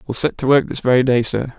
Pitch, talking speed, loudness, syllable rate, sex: 125 Hz, 305 wpm, -17 LUFS, 6.3 syllables/s, male